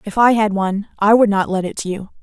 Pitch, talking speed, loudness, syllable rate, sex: 205 Hz, 295 wpm, -16 LUFS, 6.2 syllables/s, female